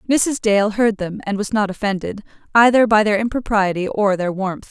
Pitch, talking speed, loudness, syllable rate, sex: 210 Hz, 190 wpm, -18 LUFS, 5.0 syllables/s, female